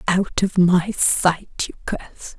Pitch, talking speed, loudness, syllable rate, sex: 180 Hz, 150 wpm, -20 LUFS, 4.1 syllables/s, female